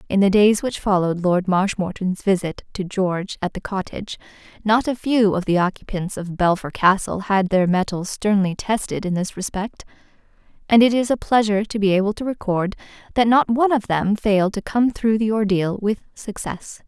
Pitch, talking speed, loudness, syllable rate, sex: 200 Hz, 190 wpm, -20 LUFS, 5.3 syllables/s, female